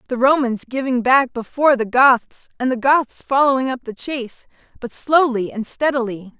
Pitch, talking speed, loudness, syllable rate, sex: 255 Hz, 170 wpm, -18 LUFS, 5.1 syllables/s, female